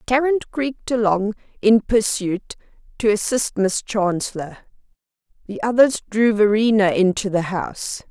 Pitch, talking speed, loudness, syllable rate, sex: 215 Hz, 120 wpm, -19 LUFS, 4.4 syllables/s, female